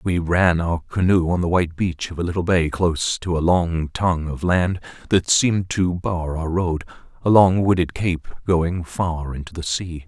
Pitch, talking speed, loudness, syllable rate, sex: 85 Hz, 205 wpm, -20 LUFS, 4.6 syllables/s, male